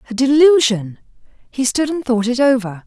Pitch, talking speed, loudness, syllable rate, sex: 250 Hz, 170 wpm, -15 LUFS, 5.1 syllables/s, female